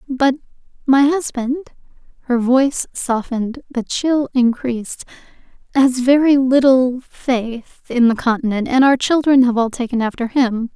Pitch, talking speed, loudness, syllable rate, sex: 255 Hz, 125 wpm, -16 LUFS, 4.4 syllables/s, female